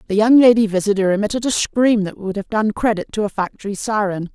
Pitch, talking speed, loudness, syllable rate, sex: 210 Hz, 220 wpm, -17 LUFS, 6.0 syllables/s, female